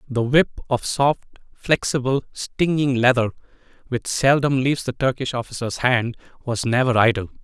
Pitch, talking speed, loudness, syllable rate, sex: 130 Hz, 135 wpm, -21 LUFS, 4.9 syllables/s, male